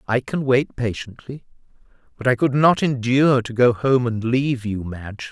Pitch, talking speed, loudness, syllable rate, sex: 125 Hz, 180 wpm, -20 LUFS, 5.0 syllables/s, male